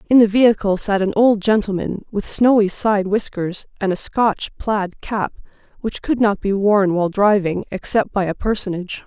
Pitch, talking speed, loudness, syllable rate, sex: 205 Hz, 180 wpm, -18 LUFS, 4.9 syllables/s, female